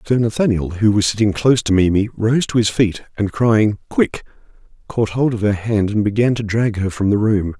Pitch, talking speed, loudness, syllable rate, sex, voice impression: 105 Hz, 220 wpm, -17 LUFS, 5.2 syllables/s, male, masculine, middle-aged, slightly relaxed, powerful, soft, slightly muffled, raspy, cool, intellectual, slightly mature, wild, slightly strict